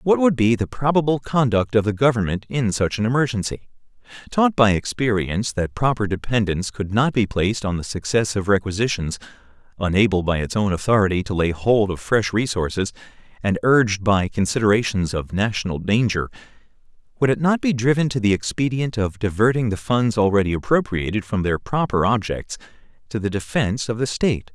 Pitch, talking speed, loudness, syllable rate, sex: 110 Hz, 170 wpm, -20 LUFS, 5.7 syllables/s, male